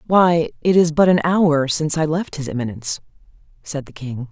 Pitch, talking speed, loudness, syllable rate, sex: 150 Hz, 195 wpm, -18 LUFS, 5.3 syllables/s, female